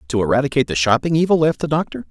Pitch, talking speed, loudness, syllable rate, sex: 140 Hz, 230 wpm, -17 LUFS, 8.3 syllables/s, male